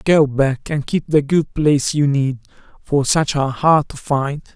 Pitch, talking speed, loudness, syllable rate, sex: 145 Hz, 200 wpm, -17 LUFS, 4.4 syllables/s, male